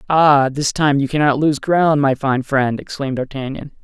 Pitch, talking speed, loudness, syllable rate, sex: 140 Hz, 190 wpm, -17 LUFS, 4.8 syllables/s, male